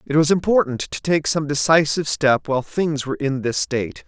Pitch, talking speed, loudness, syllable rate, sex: 140 Hz, 205 wpm, -20 LUFS, 5.6 syllables/s, male